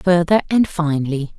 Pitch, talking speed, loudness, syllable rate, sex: 165 Hz, 130 wpm, -18 LUFS, 4.8 syllables/s, female